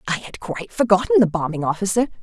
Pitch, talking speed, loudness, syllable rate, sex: 200 Hz, 190 wpm, -20 LUFS, 6.7 syllables/s, female